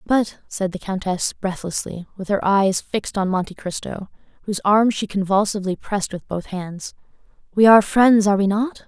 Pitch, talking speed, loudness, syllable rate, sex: 200 Hz, 175 wpm, -20 LUFS, 5.3 syllables/s, female